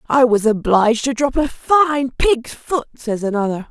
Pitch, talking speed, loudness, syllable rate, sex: 250 Hz, 180 wpm, -17 LUFS, 4.3 syllables/s, female